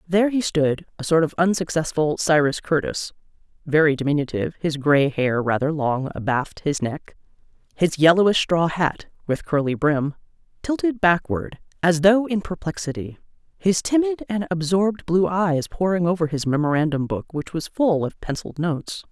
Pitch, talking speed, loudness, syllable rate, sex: 165 Hz, 155 wpm, -21 LUFS, 4.4 syllables/s, female